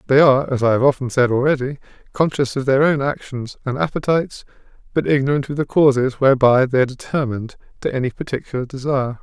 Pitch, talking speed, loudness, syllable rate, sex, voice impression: 135 Hz, 180 wpm, -18 LUFS, 6.6 syllables/s, male, masculine, very adult-like, slightly thick, slightly cool, slightly refreshing, sincere, calm